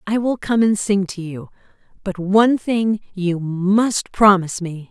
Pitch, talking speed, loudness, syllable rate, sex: 200 Hz, 160 wpm, -18 LUFS, 4.2 syllables/s, female